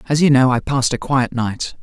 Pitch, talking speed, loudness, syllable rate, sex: 130 Hz, 265 wpm, -17 LUFS, 5.6 syllables/s, male